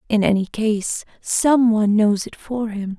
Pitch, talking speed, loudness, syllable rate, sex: 215 Hz, 180 wpm, -19 LUFS, 4.2 syllables/s, female